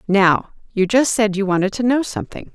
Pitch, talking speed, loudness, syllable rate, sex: 215 Hz, 210 wpm, -18 LUFS, 5.4 syllables/s, female